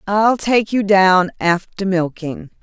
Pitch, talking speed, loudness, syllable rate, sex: 195 Hz, 135 wpm, -16 LUFS, 3.5 syllables/s, female